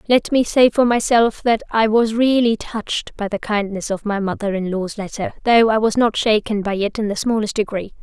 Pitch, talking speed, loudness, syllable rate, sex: 215 Hz, 225 wpm, -18 LUFS, 5.2 syllables/s, female